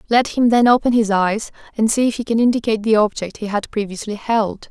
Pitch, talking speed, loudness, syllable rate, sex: 225 Hz, 230 wpm, -18 LUFS, 5.8 syllables/s, female